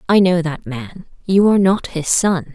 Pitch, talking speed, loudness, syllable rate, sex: 180 Hz, 210 wpm, -16 LUFS, 4.6 syllables/s, female